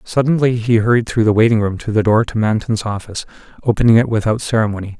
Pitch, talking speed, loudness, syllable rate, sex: 110 Hz, 205 wpm, -16 LUFS, 6.6 syllables/s, male